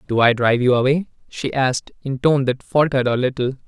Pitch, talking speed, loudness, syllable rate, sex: 130 Hz, 210 wpm, -19 LUFS, 6.4 syllables/s, male